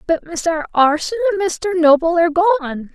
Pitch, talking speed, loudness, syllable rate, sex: 340 Hz, 165 wpm, -16 LUFS, 5.5 syllables/s, female